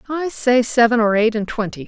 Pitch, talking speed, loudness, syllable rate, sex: 235 Hz, 225 wpm, -17 LUFS, 5.2 syllables/s, female